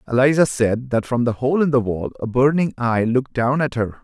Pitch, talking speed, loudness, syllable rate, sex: 125 Hz, 240 wpm, -19 LUFS, 5.5 syllables/s, male